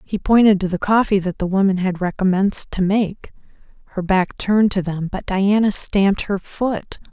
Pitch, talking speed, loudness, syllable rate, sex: 195 Hz, 185 wpm, -18 LUFS, 4.9 syllables/s, female